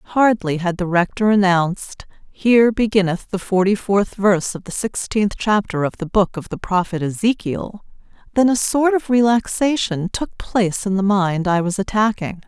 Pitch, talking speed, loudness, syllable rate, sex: 200 Hz, 170 wpm, -18 LUFS, 4.7 syllables/s, female